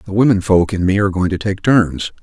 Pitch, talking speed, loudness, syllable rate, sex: 95 Hz, 270 wpm, -15 LUFS, 5.9 syllables/s, male